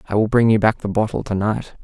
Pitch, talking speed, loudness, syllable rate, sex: 105 Hz, 295 wpm, -18 LUFS, 6.3 syllables/s, male